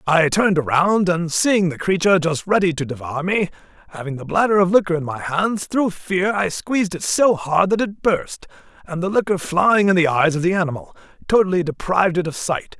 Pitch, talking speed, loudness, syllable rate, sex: 180 Hz, 210 wpm, -19 LUFS, 5.3 syllables/s, male